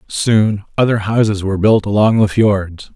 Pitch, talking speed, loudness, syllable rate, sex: 105 Hz, 160 wpm, -14 LUFS, 4.5 syllables/s, male